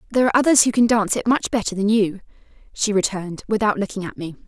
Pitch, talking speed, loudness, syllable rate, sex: 210 Hz, 230 wpm, -19 LUFS, 7.7 syllables/s, female